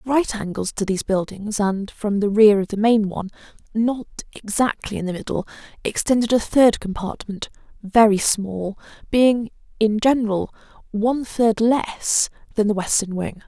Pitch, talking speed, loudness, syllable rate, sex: 215 Hz, 145 wpm, -20 LUFS, 4.7 syllables/s, female